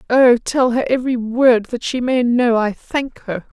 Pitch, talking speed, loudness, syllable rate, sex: 240 Hz, 200 wpm, -17 LUFS, 4.2 syllables/s, female